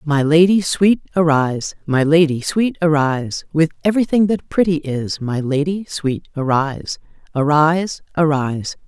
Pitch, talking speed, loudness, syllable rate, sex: 155 Hz, 130 wpm, -17 LUFS, 4.7 syllables/s, female